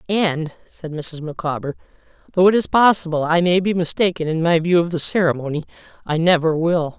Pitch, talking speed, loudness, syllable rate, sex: 170 Hz, 180 wpm, -18 LUFS, 5.4 syllables/s, female